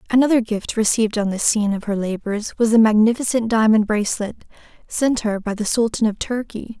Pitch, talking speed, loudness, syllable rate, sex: 220 Hz, 185 wpm, -19 LUFS, 5.7 syllables/s, female